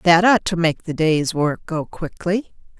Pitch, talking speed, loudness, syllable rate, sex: 170 Hz, 195 wpm, -19 LUFS, 4.1 syllables/s, female